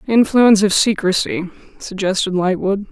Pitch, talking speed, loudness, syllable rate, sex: 200 Hz, 105 wpm, -16 LUFS, 5.0 syllables/s, female